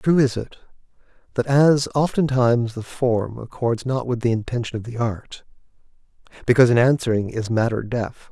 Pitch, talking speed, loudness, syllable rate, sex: 120 Hz, 160 wpm, -21 LUFS, 5.1 syllables/s, male